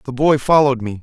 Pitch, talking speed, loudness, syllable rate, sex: 135 Hz, 235 wpm, -15 LUFS, 6.7 syllables/s, male